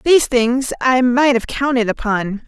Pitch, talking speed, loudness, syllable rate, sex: 250 Hz, 170 wpm, -16 LUFS, 4.4 syllables/s, female